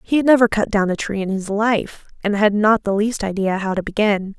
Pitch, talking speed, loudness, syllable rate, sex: 205 Hz, 260 wpm, -18 LUFS, 5.4 syllables/s, female